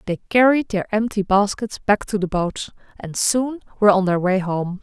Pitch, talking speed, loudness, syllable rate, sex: 200 Hz, 200 wpm, -19 LUFS, 4.8 syllables/s, female